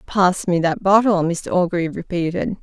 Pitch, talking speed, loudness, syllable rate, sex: 180 Hz, 160 wpm, -19 LUFS, 4.9 syllables/s, female